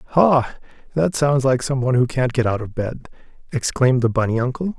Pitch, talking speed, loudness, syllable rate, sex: 130 Hz, 200 wpm, -19 LUFS, 5.3 syllables/s, male